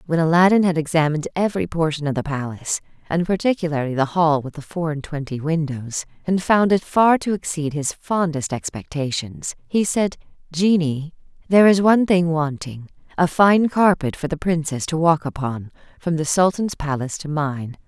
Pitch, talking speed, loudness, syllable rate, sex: 160 Hz, 170 wpm, -20 LUFS, 5.2 syllables/s, female